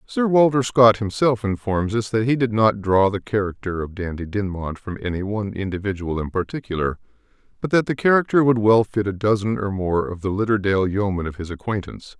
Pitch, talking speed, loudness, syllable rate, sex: 105 Hz, 195 wpm, -21 LUFS, 5.7 syllables/s, male